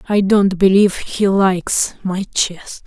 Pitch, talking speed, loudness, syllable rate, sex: 190 Hz, 145 wpm, -16 LUFS, 3.9 syllables/s, female